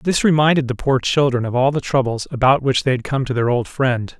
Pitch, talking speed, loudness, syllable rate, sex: 130 Hz, 255 wpm, -18 LUFS, 5.6 syllables/s, male